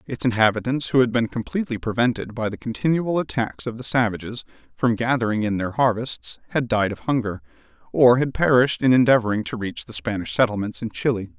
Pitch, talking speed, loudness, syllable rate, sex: 115 Hz, 185 wpm, -22 LUFS, 5.9 syllables/s, male